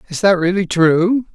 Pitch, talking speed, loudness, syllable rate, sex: 185 Hz, 180 wpm, -15 LUFS, 4.5 syllables/s, male